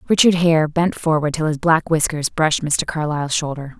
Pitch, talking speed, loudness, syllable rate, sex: 155 Hz, 190 wpm, -18 LUFS, 5.4 syllables/s, female